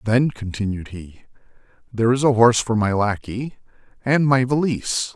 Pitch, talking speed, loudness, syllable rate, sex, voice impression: 115 Hz, 150 wpm, -20 LUFS, 5.1 syllables/s, male, very masculine, very adult-like, middle-aged, very thick, tensed, powerful, slightly bright, slightly soft, slightly muffled, fluent, slightly raspy, very cool, very intellectual, sincere, very calm, very mature, friendly, very reassuring, unique, very wild, slightly sweet, lively, kind, slightly intense